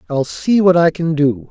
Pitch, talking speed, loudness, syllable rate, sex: 160 Hz, 240 wpm, -15 LUFS, 4.5 syllables/s, male